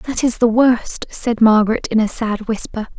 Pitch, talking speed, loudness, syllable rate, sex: 225 Hz, 200 wpm, -16 LUFS, 4.6 syllables/s, female